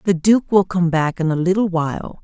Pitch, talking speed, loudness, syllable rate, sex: 180 Hz, 240 wpm, -18 LUFS, 5.3 syllables/s, female